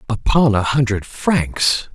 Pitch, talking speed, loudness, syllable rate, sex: 120 Hz, 125 wpm, -17 LUFS, 3.4 syllables/s, male